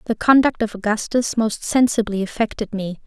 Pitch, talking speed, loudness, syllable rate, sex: 220 Hz, 155 wpm, -19 LUFS, 5.2 syllables/s, female